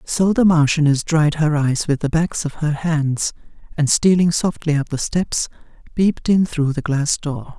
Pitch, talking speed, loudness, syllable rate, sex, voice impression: 155 Hz, 190 wpm, -18 LUFS, 4.4 syllables/s, male, masculine, adult-like, relaxed, weak, soft, fluent, calm, friendly, reassuring, kind, modest